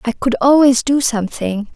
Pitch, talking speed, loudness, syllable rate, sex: 245 Hz, 170 wpm, -15 LUFS, 4.9 syllables/s, female